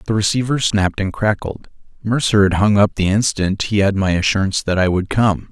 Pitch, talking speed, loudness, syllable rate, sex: 100 Hz, 205 wpm, -17 LUFS, 5.6 syllables/s, male